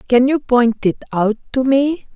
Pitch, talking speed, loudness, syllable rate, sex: 250 Hz, 195 wpm, -16 LUFS, 4.1 syllables/s, female